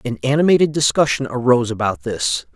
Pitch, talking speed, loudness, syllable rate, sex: 130 Hz, 140 wpm, -17 LUFS, 6.0 syllables/s, male